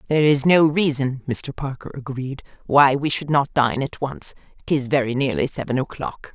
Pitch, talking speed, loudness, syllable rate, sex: 135 Hz, 190 wpm, -21 LUFS, 5.1 syllables/s, female